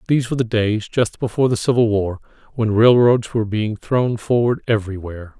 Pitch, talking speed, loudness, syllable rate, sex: 115 Hz, 180 wpm, -18 LUFS, 5.9 syllables/s, male